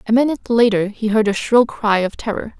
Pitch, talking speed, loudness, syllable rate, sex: 220 Hz, 230 wpm, -17 LUFS, 5.8 syllables/s, female